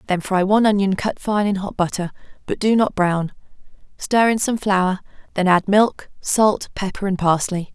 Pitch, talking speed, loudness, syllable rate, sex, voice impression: 195 Hz, 185 wpm, -19 LUFS, 4.8 syllables/s, female, very feminine, young, thin, tensed, slightly powerful, bright, soft, clear, fluent, cute, intellectual, very refreshing, sincere, calm, friendly, reassuring, unique, elegant, slightly wild, sweet, lively, kind, slightly intense, slightly sharp, slightly modest, light